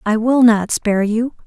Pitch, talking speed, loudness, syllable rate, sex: 225 Hz, 205 wpm, -15 LUFS, 4.7 syllables/s, female